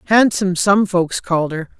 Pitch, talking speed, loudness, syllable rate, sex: 185 Hz, 165 wpm, -16 LUFS, 5.2 syllables/s, female